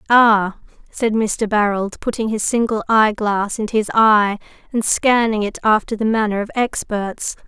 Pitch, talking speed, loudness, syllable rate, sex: 215 Hz, 150 wpm, -18 LUFS, 4.4 syllables/s, female